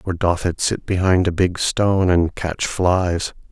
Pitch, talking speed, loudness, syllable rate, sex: 90 Hz, 190 wpm, -19 LUFS, 4.0 syllables/s, male